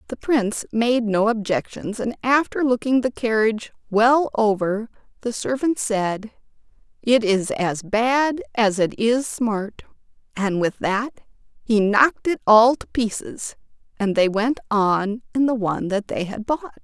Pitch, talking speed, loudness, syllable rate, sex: 225 Hz, 155 wpm, -21 LUFS, 4.1 syllables/s, female